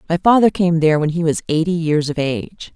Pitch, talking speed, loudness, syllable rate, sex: 165 Hz, 240 wpm, -17 LUFS, 6.1 syllables/s, female